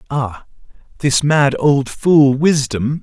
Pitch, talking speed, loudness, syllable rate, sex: 140 Hz, 120 wpm, -15 LUFS, 3.1 syllables/s, male